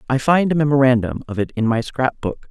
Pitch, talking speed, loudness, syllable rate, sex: 130 Hz, 240 wpm, -18 LUFS, 5.9 syllables/s, female